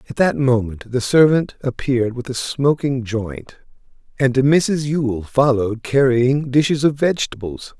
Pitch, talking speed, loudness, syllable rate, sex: 130 Hz, 140 wpm, -18 LUFS, 4.3 syllables/s, male